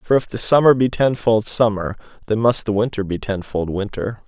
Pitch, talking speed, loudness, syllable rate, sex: 110 Hz, 195 wpm, -19 LUFS, 5.1 syllables/s, male